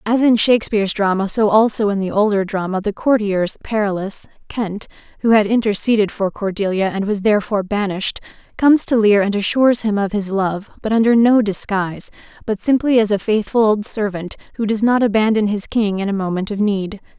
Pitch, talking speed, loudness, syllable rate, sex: 210 Hz, 180 wpm, -17 LUFS, 5.6 syllables/s, female